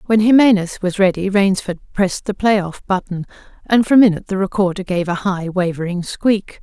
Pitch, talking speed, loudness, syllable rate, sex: 195 Hz, 180 wpm, -17 LUFS, 5.5 syllables/s, female